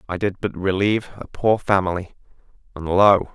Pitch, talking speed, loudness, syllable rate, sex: 95 Hz, 160 wpm, -20 LUFS, 5.1 syllables/s, male